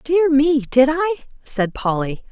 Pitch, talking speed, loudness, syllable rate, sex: 280 Hz, 155 wpm, -18 LUFS, 3.8 syllables/s, female